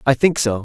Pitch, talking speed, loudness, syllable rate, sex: 130 Hz, 280 wpm, -17 LUFS, 5.9 syllables/s, male